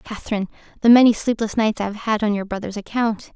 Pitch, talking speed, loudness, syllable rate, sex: 215 Hz, 215 wpm, -20 LUFS, 6.4 syllables/s, female